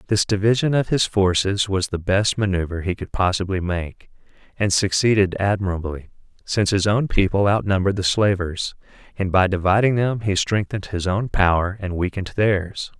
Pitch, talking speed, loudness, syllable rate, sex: 95 Hz, 160 wpm, -20 LUFS, 5.2 syllables/s, male